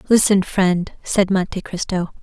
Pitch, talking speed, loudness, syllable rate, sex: 190 Hz, 135 wpm, -19 LUFS, 4.1 syllables/s, female